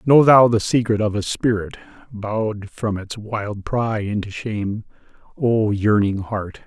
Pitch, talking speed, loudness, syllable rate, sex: 110 Hz, 155 wpm, -20 LUFS, 4.1 syllables/s, male